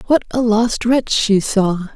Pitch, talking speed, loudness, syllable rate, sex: 225 Hz, 185 wpm, -16 LUFS, 3.6 syllables/s, female